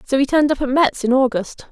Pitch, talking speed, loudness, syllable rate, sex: 265 Hz, 280 wpm, -17 LUFS, 6.5 syllables/s, female